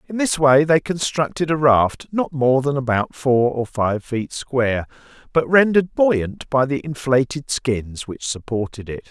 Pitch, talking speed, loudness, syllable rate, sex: 135 Hz, 170 wpm, -19 LUFS, 4.3 syllables/s, male